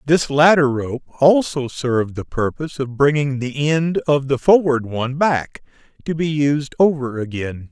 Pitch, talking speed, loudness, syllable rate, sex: 140 Hz, 165 wpm, -18 LUFS, 4.5 syllables/s, male